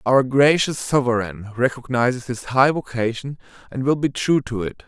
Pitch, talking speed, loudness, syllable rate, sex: 125 Hz, 160 wpm, -20 LUFS, 4.8 syllables/s, male